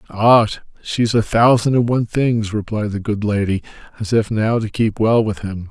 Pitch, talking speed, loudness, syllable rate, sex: 110 Hz, 200 wpm, -17 LUFS, 4.8 syllables/s, male